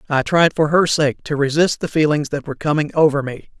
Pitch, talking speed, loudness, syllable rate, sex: 150 Hz, 235 wpm, -17 LUFS, 5.9 syllables/s, male